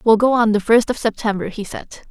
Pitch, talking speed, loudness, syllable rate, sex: 220 Hz, 255 wpm, -17 LUFS, 5.7 syllables/s, female